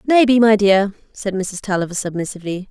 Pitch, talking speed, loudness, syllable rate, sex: 205 Hz, 155 wpm, -17 LUFS, 5.8 syllables/s, female